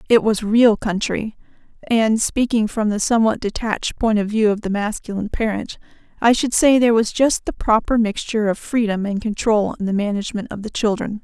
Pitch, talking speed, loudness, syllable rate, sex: 215 Hz, 180 wpm, -19 LUFS, 5.5 syllables/s, female